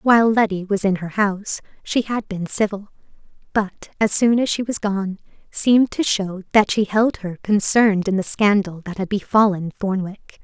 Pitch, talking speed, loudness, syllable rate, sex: 205 Hz, 185 wpm, -19 LUFS, 4.9 syllables/s, female